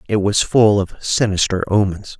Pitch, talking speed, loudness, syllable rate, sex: 100 Hz, 165 wpm, -17 LUFS, 4.6 syllables/s, male